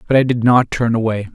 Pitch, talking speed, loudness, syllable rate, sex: 120 Hz, 265 wpm, -15 LUFS, 6.1 syllables/s, male